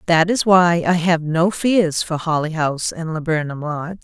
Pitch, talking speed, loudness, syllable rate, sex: 165 Hz, 195 wpm, -18 LUFS, 4.7 syllables/s, female